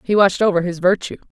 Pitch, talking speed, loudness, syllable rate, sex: 185 Hz, 230 wpm, -17 LUFS, 7.3 syllables/s, female